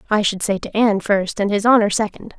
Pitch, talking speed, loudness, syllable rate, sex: 210 Hz, 250 wpm, -18 LUFS, 5.5 syllables/s, female